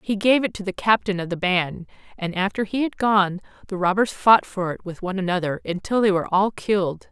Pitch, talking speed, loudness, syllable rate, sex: 195 Hz, 230 wpm, -22 LUFS, 5.7 syllables/s, female